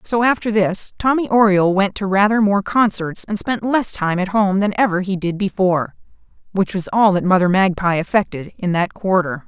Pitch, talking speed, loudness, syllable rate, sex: 195 Hz, 195 wpm, -17 LUFS, 5.2 syllables/s, female